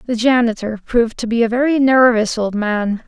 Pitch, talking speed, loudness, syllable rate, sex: 235 Hz, 195 wpm, -16 LUFS, 5.2 syllables/s, female